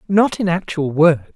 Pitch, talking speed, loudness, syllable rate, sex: 170 Hz, 175 wpm, -17 LUFS, 4.7 syllables/s, male